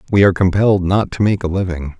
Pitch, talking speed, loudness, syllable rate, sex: 95 Hz, 240 wpm, -16 LUFS, 6.9 syllables/s, male